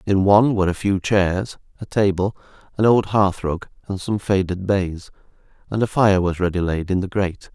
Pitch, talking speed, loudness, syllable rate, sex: 95 Hz, 200 wpm, -20 LUFS, 5.4 syllables/s, male